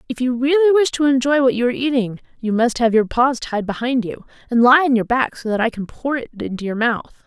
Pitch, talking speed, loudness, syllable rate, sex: 250 Hz, 265 wpm, -18 LUFS, 5.8 syllables/s, female